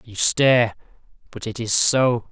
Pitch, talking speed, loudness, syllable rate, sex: 115 Hz, 155 wpm, -18 LUFS, 4.2 syllables/s, male